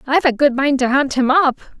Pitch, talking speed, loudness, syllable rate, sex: 275 Hz, 265 wpm, -16 LUFS, 6.1 syllables/s, female